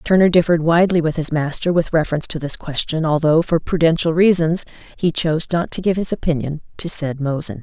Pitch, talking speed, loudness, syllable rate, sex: 165 Hz, 195 wpm, -18 LUFS, 6.1 syllables/s, female